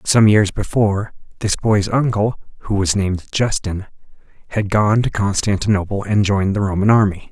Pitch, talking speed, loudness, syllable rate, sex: 100 Hz, 155 wpm, -17 LUFS, 5.2 syllables/s, male